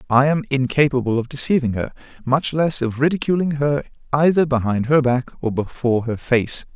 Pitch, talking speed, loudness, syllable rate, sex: 135 Hz, 170 wpm, -19 LUFS, 5.4 syllables/s, male